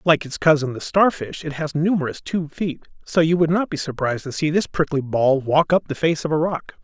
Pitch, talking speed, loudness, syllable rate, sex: 155 Hz, 245 wpm, -21 LUFS, 5.5 syllables/s, male